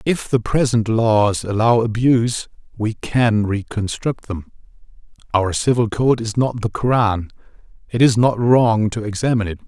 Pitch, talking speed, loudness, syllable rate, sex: 110 Hz, 150 wpm, -18 LUFS, 4.4 syllables/s, male